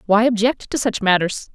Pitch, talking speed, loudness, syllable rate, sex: 220 Hz, 195 wpm, -18 LUFS, 5.0 syllables/s, female